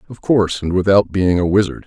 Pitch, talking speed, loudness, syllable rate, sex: 95 Hz, 225 wpm, -16 LUFS, 6.0 syllables/s, male